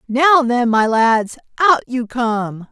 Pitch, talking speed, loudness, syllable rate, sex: 245 Hz, 155 wpm, -15 LUFS, 3.7 syllables/s, female